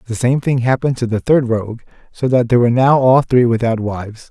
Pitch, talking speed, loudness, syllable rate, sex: 120 Hz, 235 wpm, -15 LUFS, 6.0 syllables/s, male